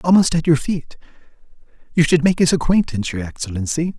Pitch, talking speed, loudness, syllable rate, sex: 155 Hz, 165 wpm, -18 LUFS, 6.0 syllables/s, male